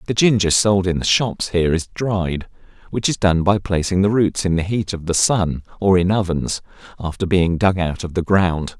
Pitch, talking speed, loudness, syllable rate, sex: 95 Hz, 220 wpm, -18 LUFS, 4.8 syllables/s, male